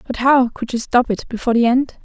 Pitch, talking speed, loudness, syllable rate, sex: 245 Hz, 265 wpm, -17 LUFS, 5.8 syllables/s, female